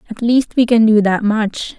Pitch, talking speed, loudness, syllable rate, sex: 220 Hz, 235 wpm, -14 LUFS, 4.6 syllables/s, female